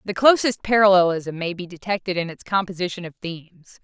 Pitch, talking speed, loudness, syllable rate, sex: 185 Hz, 170 wpm, -21 LUFS, 5.6 syllables/s, female